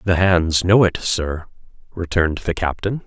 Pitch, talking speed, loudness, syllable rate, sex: 90 Hz, 155 wpm, -18 LUFS, 4.4 syllables/s, male